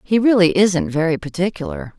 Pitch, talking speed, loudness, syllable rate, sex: 165 Hz, 150 wpm, -17 LUFS, 5.3 syllables/s, female